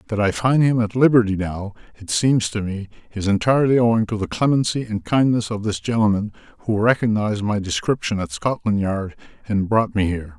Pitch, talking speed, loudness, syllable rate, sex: 105 Hz, 190 wpm, -20 LUFS, 5.7 syllables/s, male